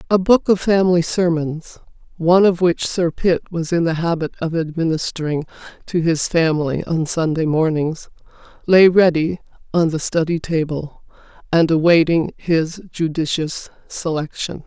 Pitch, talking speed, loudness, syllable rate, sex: 165 Hz, 135 wpm, -18 LUFS, 4.6 syllables/s, female